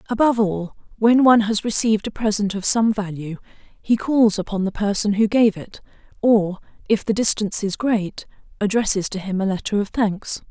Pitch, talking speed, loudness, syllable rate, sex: 210 Hz, 185 wpm, -20 LUFS, 5.3 syllables/s, female